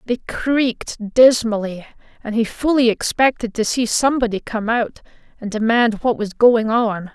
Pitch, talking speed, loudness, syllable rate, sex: 230 Hz, 150 wpm, -18 LUFS, 4.5 syllables/s, female